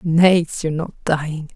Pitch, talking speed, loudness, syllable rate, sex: 160 Hz, 155 wpm, -19 LUFS, 4.5 syllables/s, female